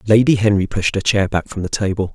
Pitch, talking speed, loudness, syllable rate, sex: 100 Hz, 250 wpm, -17 LUFS, 6.0 syllables/s, male